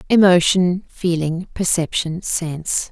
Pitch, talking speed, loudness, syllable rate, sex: 175 Hz, 80 wpm, -18 LUFS, 3.8 syllables/s, female